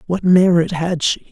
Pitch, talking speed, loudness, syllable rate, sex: 175 Hz, 185 wpm, -15 LUFS, 4.5 syllables/s, male